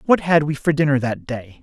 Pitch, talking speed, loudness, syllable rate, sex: 140 Hz, 260 wpm, -19 LUFS, 5.4 syllables/s, male